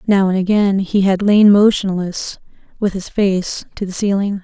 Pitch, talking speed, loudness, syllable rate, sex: 195 Hz, 175 wpm, -15 LUFS, 4.5 syllables/s, female